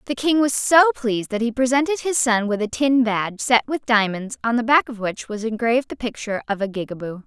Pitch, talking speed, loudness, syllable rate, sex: 240 Hz, 240 wpm, -20 LUFS, 5.8 syllables/s, female